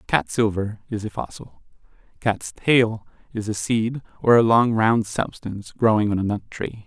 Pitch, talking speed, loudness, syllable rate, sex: 105 Hz, 175 wpm, -22 LUFS, 4.5 syllables/s, male